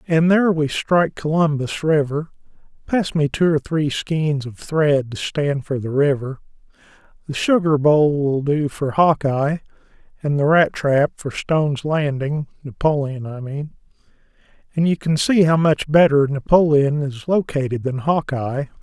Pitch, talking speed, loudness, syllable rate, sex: 150 Hz, 145 wpm, -19 LUFS, 4.3 syllables/s, male